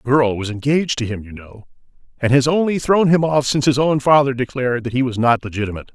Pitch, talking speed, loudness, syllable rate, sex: 130 Hz, 240 wpm, -17 LUFS, 6.5 syllables/s, male